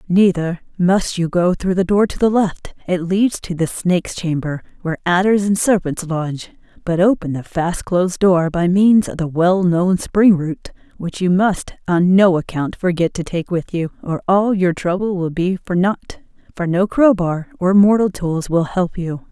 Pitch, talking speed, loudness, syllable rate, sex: 180 Hz, 195 wpm, -17 LUFS, 4.5 syllables/s, female